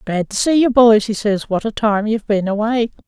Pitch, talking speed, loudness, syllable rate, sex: 215 Hz, 255 wpm, -16 LUFS, 5.3 syllables/s, female